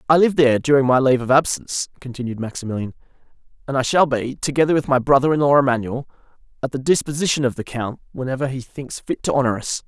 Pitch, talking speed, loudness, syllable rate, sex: 135 Hz, 205 wpm, -19 LUFS, 6.7 syllables/s, male